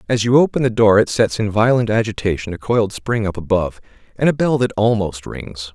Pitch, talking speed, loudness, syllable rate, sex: 110 Hz, 220 wpm, -17 LUFS, 5.8 syllables/s, male